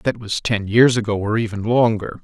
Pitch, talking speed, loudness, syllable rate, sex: 110 Hz, 215 wpm, -18 LUFS, 5.0 syllables/s, male